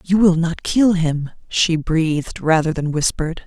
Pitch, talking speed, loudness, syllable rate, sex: 165 Hz, 175 wpm, -18 LUFS, 4.4 syllables/s, female